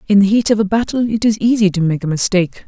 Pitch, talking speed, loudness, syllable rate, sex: 205 Hz, 290 wpm, -15 LUFS, 6.8 syllables/s, female